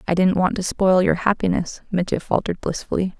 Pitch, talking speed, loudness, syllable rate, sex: 185 Hz, 190 wpm, -21 LUFS, 5.8 syllables/s, female